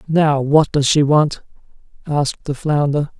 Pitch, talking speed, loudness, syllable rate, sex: 145 Hz, 150 wpm, -16 LUFS, 4.5 syllables/s, male